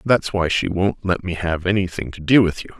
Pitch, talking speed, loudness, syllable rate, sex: 90 Hz, 260 wpm, -20 LUFS, 5.2 syllables/s, male